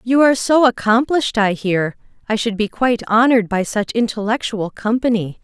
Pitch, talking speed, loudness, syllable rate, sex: 225 Hz, 165 wpm, -17 LUFS, 5.4 syllables/s, female